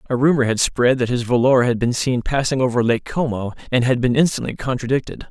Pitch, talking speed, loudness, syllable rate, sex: 125 Hz, 215 wpm, -19 LUFS, 5.9 syllables/s, male